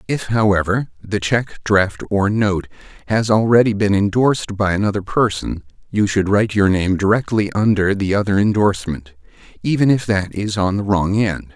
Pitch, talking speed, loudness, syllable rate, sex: 100 Hz, 165 wpm, -17 LUFS, 5.0 syllables/s, male